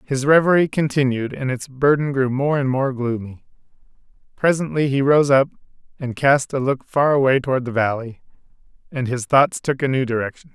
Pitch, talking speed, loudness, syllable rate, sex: 135 Hz, 175 wpm, -19 LUFS, 5.3 syllables/s, male